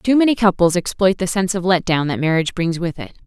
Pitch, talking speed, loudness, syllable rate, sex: 180 Hz, 260 wpm, -18 LUFS, 6.4 syllables/s, female